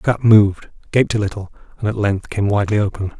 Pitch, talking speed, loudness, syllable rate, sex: 105 Hz, 225 wpm, -17 LUFS, 6.4 syllables/s, male